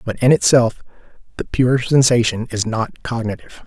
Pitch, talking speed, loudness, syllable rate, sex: 120 Hz, 145 wpm, -17 LUFS, 5.2 syllables/s, male